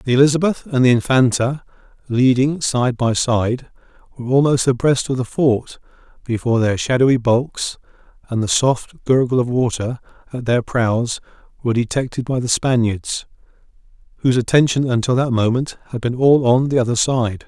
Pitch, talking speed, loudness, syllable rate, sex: 125 Hz, 155 wpm, -18 LUFS, 5.1 syllables/s, male